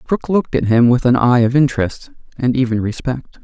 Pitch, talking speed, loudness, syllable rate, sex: 125 Hz, 210 wpm, -16 LUFS, 5.6 syllables/s, male